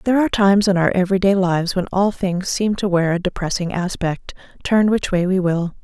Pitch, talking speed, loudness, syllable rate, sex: 190 Hz, 225 wpm, -18 LUFS, 5.8 syllables/s, female